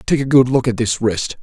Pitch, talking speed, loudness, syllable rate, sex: 125 Hz, 295 wpm, -16 LUFS, 5.1 syllables/s, male